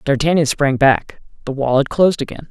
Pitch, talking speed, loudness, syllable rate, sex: 145 Hz, 190 wpm, -16 LUFS, 5.6 syllables/s, male